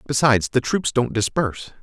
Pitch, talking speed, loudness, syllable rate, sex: 125 Hz, 165 wpm, -20 LUFS, 5.6 syllables/s, male